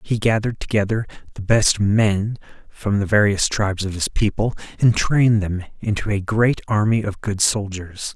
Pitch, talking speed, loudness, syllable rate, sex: 105 Hz, 170 wpm, -20 LUFS, 4.9 syllables/s, male